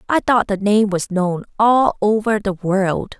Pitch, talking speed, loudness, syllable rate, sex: 205 Hz, 190 wpm, -17 LUFS, 3.9 syllables/s, female